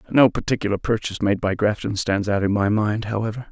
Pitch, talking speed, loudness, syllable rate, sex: 105 Hz, 205 wpm, -21 LUFS, 6.1 syllables/s, male